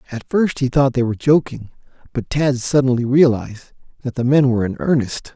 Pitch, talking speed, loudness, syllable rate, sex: 130 Hz, 190 wpm, -17 LUFS, 5.9 syllables/s, male